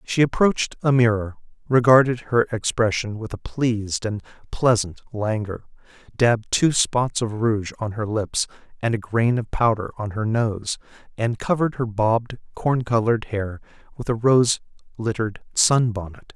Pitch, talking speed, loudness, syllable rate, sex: 115 Hz, 150 wpm, -22 LUFS, 4.8 syllables/s, male